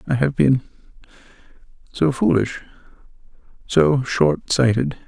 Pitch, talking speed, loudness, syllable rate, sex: 125 Hz, 70 wpm, -19 LUFS, 4.0 syllables/s, male